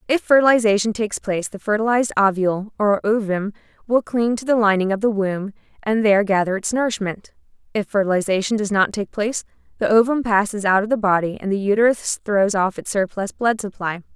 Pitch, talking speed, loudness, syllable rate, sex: 210 Hz, 185 wpm, -19 LUFS, 5.9 syllables/s, female